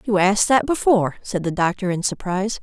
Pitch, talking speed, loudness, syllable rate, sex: 195 Hz, 205 wpm, -20 LUFS, 6.1 syllables/s, female